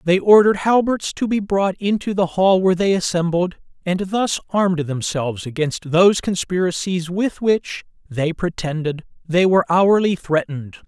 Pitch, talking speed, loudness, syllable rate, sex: 180 Hz, 150 wpm, -18 LUFS, 4.9 syllables/s, male